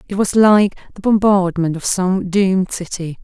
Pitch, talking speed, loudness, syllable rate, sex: 190 Hz, 165 wpm, -16 LUFS, 4.6 syllables/s, female